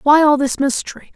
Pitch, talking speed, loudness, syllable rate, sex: 280 Hz, 210 wpm, -16 LUFS, 5.7 syllables/s, female